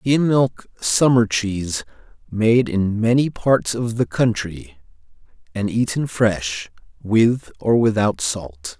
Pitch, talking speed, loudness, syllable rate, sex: 110 Hz, 125 wpm, -19 LUFS, 3.4 syllables/s, male